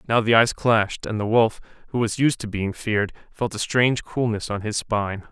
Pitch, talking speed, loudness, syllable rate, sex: 110 Hz, 225 wpm, -22 LUFS, 5.4 syllables/s, male